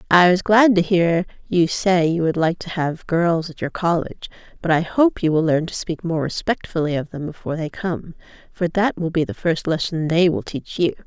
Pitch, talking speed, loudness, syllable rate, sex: 170 Hz, 230 wpm, -20 LUFS, 5.1 syllables/s, female